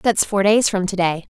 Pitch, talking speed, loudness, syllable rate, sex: 195 Hz, 225 wpm, -18 LUFS, 5.0 syllables/s, female